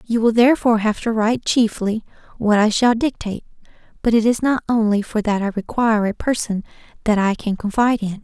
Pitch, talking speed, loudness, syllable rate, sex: 220 Hz, 195 wpm, -19 LUFS, 5.9 syllables/s, female